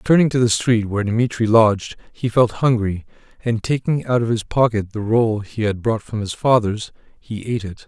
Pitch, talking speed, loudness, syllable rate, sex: 110 Hz, 205 wpm, -19 LUFS, 5.2 syllables/s, male